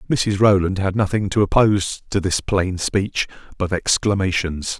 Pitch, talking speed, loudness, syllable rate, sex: 95 Hz, 150 wpm, -19 LUFS, 4.5 syllables/s, male